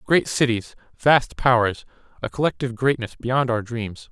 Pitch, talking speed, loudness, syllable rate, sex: 120 Hz, 145 wpm, -22 LUFS, 4.7 syllables/s, male